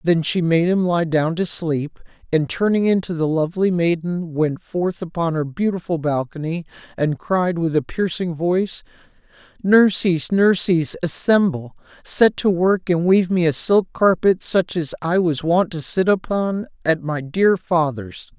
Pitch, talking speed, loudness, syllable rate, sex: 170 Hz, 160 wpm, -19 LUFS, 4.3 syllables/s, male